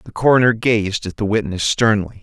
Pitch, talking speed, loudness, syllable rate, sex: 105 Hz, 190 wpm, -17 LUFS, 5.3 syllables/s, male